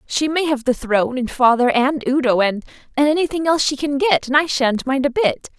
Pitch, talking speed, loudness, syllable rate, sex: 270 Hz, 225 wpm, -18 LUFS, 5.6 syllables/s, female